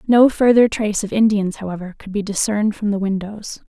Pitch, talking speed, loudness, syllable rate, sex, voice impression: 205 Hz, 195 wpm, -18 LUFS, 5.8 syllables/s, female, feminine, slightly weak, soft, fluent, slightly intellectual, calm, reassuring, elegant, kind, modest